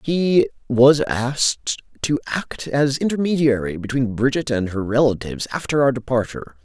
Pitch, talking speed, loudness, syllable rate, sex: 130 Hz, 135 wpm, -20 LUFS, 5.2 syllables/s, male